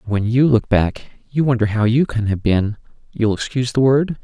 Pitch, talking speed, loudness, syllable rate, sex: 120 Hz, 215 wpm, -18 LUFS, 5.2 syllables/s, male